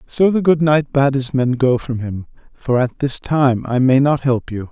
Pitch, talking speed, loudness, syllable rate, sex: 130 Hz, 240 wpm, -16 LUFS, 4.4 syllables/s, male